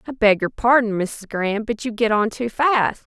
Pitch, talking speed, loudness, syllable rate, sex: 225 Hz, 210 wpm, -20 LUFS, 4.9 syllables/s, female